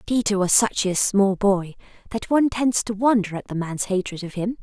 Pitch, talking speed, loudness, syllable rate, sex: 205 Hz, 220 wpm, -21 LUFS, 5.1 syllables/s, female